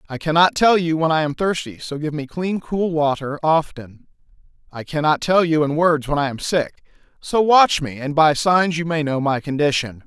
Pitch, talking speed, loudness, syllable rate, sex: 155 Hz, 215 wpm, -19 LUFS, 5.0 syllables/s, male